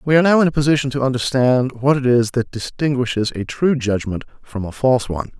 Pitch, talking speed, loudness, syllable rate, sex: 130 Hz, 220 wpm, -18 LUFS, 6.5 syllables/s, male